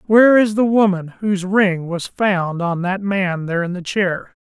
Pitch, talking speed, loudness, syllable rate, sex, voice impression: 190 Hz, 205 wpm, -17 LUFS, 4.5 syllables/s, male, masculine, adult-like, tensed, powerful, slightly bright, muffled, fluent, intellectual, friendly, unique, lively, slightly modest, slightly light